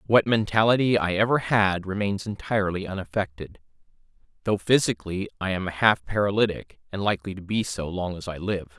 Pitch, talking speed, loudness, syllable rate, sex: 100 Hz, 165 wpm, -24 LUFS, 5.7 syllables/s, male